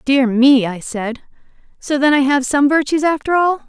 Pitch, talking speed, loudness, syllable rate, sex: 275 Hz, 195 wpm, -15 LUFS, 4.7 syllables/s, female